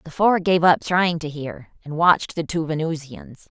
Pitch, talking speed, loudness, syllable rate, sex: 160 Hz, 200 wpm, -20 LUFS, 4.6 syllables/s, female